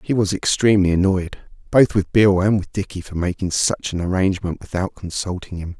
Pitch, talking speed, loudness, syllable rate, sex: 95 Hz, 185 wpm, -19 LUFS, 5.8 syllables/s, male